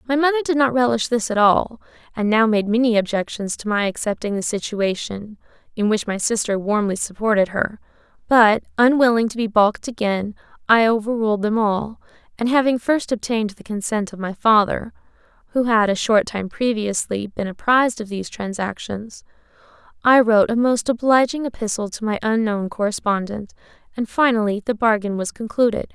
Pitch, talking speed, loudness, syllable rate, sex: 220 Hz, 165 wpm, -19 LUFS, 4.8 syllables/s, female